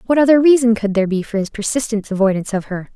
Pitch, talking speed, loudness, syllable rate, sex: 220 Hz, 245 wpm, -16 LUFS, 7.2 syllables/s, female